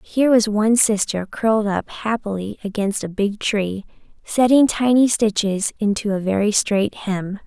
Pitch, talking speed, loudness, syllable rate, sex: 210 Hz, 155 wpm, -19 LUFS, 4.6 syllables/s, female